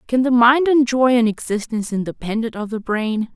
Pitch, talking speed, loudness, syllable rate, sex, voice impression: 235 Hz, 180 wpm, -18 LUFS, 5.3 syllables/s, female, very feminine, adult-like, slightly tensed, slightly clear, slightly cute, slightly sweet